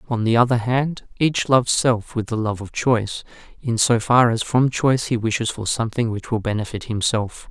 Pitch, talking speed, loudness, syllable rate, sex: 115 Hz, 210 wpm, -20 LUFS, 5.3 syllables/s, male